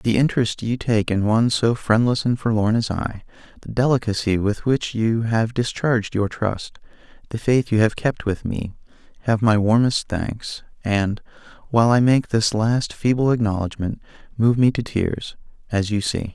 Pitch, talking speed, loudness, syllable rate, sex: 110 Hz, 170 wpm, -21 LUFS, 4.7 syllables/s, male